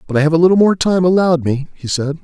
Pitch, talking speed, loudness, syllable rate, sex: 160 Hz, 295 wpm, -14 LUFS, 7.2 syllables/s, male